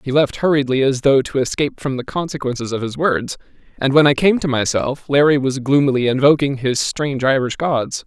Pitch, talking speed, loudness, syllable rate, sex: 135 Hz, 200 wpm, -17 LUFS, 5.6 syllables/s, male